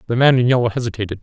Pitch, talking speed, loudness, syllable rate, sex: 120 Hz, 245 wpm, -17 LUFS, 8.6 syllables/s, male